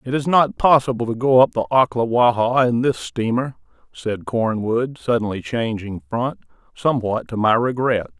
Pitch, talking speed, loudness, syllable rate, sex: 120 Hz, 155 wpm, -19 LUFS, 4.8 syllables/s, male